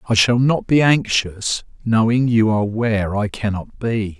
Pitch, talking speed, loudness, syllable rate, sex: 115 Hz, 170 wpm, -18 LUFS, 4.4 syllables/s, male